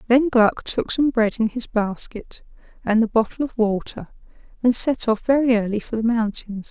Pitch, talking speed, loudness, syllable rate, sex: 230 Hz, 190 wpm, -20 LUFS, 4.8 syllables/s, female